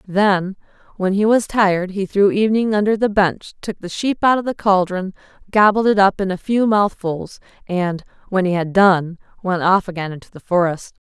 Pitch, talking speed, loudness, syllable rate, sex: 195 Hz, 195 wpm, -18 LUFS, 5.0 syllables/s, female